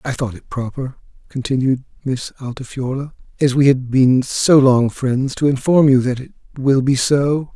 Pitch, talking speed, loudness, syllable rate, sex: 130 Hz, 175 wpm, -17 LUFS, 4.6 syllables/s, male